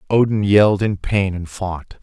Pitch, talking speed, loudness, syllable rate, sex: 100 Hz, 175 wpm, -18 LUFS, 4.4 syllables/s, male